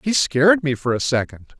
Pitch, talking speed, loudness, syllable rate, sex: 145 Hz, 225 wpm, -18 LUFS, 5.8 syllables/s, male